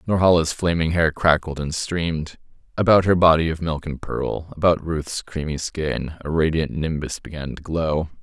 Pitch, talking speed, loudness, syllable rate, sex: 80 Hz, 155 wpm, -21 LUFS, 4.7 syllables/s, male